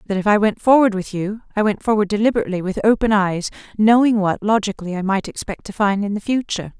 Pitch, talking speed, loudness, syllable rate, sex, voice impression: 205 Hz, 220 wpm, -18 LUFS, 6.5 syllables/s, female, feminine, adult-like, tensed, powerful, clear, fluent, intellectual, elegant, strict, slightly intense, sharp